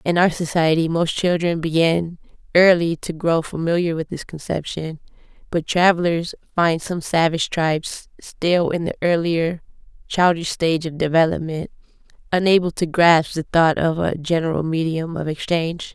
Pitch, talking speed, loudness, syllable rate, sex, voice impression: 165 Hz, 145 wpm, -20 LUFS, 4.8 syllables/s, female, feminine, slightly gender-neutral, slightly adult-like, slightly middle-aged, slightly thin, slightly relaxed, slightly weak, dark, hard, slightly clear, fluent, slightly cute, intellectual, slightly refreshing, slightly sincere, calm, slightly friendly, very unique, elegant, kind, modest